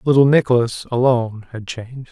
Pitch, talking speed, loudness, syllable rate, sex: 120 Hz, 140 wpm, -16 LUFS, 5.6 syllables/s, male